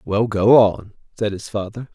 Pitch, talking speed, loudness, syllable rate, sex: 105 Hz, 185 wpm, -18 LUFS, 4.4 syllables/s, male